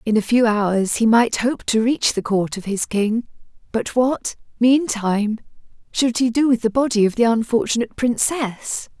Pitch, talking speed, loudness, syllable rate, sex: 230 Hz, 180 wpm, -19 LUFS, 4.6 syllables/s, female